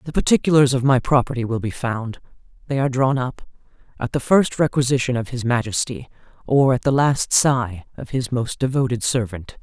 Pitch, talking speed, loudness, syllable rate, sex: 125 Hz, 170 wpm, -20 LUFS, 5.4 syllables/s, female